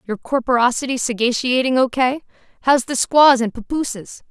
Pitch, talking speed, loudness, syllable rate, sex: 250 Hz, 140 wpm, -17 LUFS, 5.1 syllables/s, female